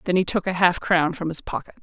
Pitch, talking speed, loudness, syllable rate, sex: 175 Hz, 295 wpm, -22 LUFS, 6.1 syllables/s, female